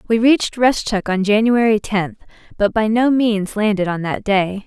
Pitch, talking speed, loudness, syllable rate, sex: 215 Hz, 180 wpm, -17 LUFS, 4.7 syllables/s, female